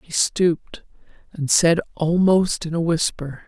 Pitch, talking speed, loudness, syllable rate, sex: 165 Hz, 140 wpm, -20 LUFS, 4.0 syllables/s, female